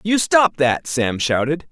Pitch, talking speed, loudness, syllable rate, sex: 160 Hz, 175 wpm, -18 LUFS, 3.8 syllables/s, male